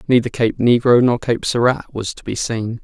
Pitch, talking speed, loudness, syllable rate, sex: 120 Hz, 210 wpm, -17 LUFS, 5.0 syllables/s, male